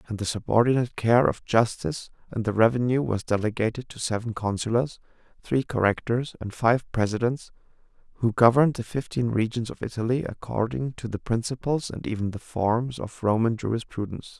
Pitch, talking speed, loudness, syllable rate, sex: 115 Hz, 155 wpm, -25 LUFS, 5.6 syllables/s, male